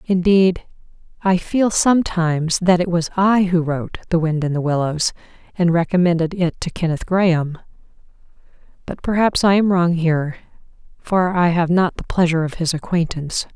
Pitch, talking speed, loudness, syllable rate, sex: 175 Hz, 160 wpm, -18 LUFS, 5.3 syllables/s, female